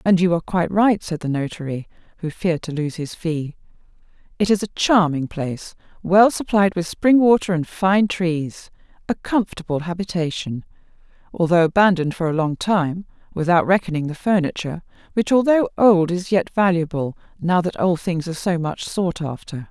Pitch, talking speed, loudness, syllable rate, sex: 175 Hz, 165 wpm, -20 LUFS, 5.2 syllables/s, female